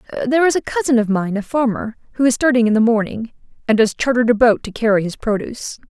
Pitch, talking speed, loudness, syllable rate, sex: 235 Hz, 235 wpm, -17 LUFS, 6.6 syllables/s, female